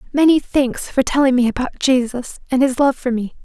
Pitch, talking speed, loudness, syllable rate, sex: 260 Hz, 210 wpm, -17 LUFS, 5.5 syllables/s, female